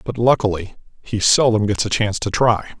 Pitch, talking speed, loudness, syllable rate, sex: 110 Hz, 195 wpm, -18 LUFS, 5.5 syllables/s, male